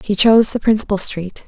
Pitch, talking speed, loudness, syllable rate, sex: 210 Hz, 205 wpm, -15 LUFS, 5.8 syllables/s, female